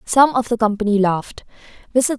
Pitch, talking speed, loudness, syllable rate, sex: 225 Hz, 135 wpm, -18 LUFS, 5.6 syllables/s, female